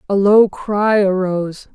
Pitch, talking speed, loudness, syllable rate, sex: 195 Hz, 140 wpm, -15 LUFS, 3.9 syllables/s, female